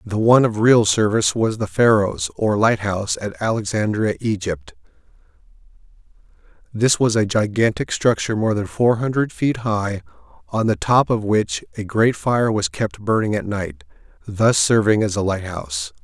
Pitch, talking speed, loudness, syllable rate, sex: 110 Hz, 155 wpm, -19 LUFS, 4.8 syllables/s, male